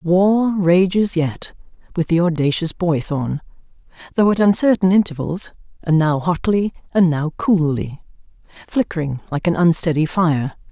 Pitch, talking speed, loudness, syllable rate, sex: 170 Hz, 125 wpm, -18 LUFS, 4.4 syllables/s, female